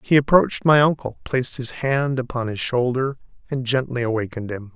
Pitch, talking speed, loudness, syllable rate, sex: 125 Hz, 175 wpm, -21 LUFS, 5.6 syllables/s, male